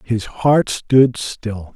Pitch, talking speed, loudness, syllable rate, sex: 115 Hz, 135 wpm, -17 LUFS, 2.4 syllables/s, male